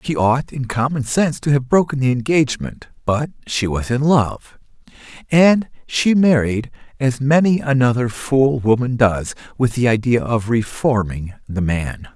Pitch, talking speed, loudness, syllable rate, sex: 125 Hz, 155 wpm, -18 LUFS, 4.4 syllables/s, male